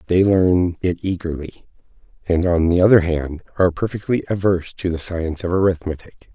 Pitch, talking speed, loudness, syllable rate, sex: 90 Hz, 160 wpm, -19 LUFS, 5.5 syllables/s, male